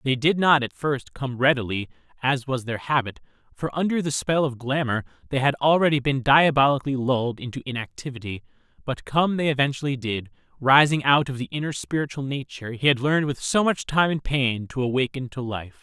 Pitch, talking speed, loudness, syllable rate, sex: 135 Hz, 190 wpm, -23 LUFS, 5.6 syllables/s, male